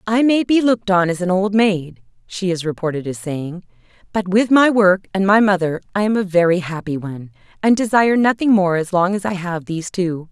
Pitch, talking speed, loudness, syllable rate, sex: 190 Hz, 220 wpm, -17 LUFS, 5.5 syllables/s, female